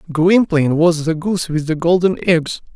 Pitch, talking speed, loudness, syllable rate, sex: 165 Hz, 175 wpm, -16 LUFS, 5.0 syllables/s, male